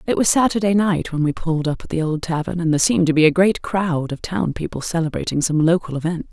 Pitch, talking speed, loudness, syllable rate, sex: 170 Hz, 255 wpm, -19 LUFS, 6.3 syllables/s, female